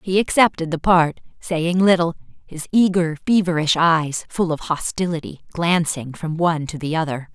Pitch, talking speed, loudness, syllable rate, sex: 165 Hz, 155 wpm, -19 LUFS, 4.8 syllables/s, female